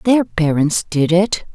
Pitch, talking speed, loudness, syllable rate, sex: 175 Hz, 155 wpm, -16 LUFS, 3.7 syllables/s, female